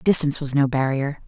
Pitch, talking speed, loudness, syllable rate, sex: 140 Hz, 190 wpm, -20 LUFS, 5.9 syllables/s, female